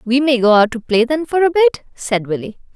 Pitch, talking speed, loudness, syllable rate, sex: 260 Hz, 260 wpm, -15 LUFS, 5.7 syllables/s, female